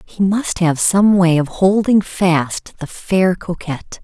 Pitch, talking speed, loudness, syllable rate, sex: 180 Hz, 165 wpm, -16 LUFS, 3.6 syllables/s, female